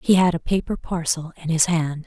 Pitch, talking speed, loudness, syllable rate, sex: 165 Hz, 235 wpm, -22 LUFS, 5.2 syllables/s, female